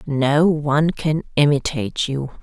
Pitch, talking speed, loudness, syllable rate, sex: 145 Hz, 125 wpm, -19 LUFS, 4.4 syllables/s, female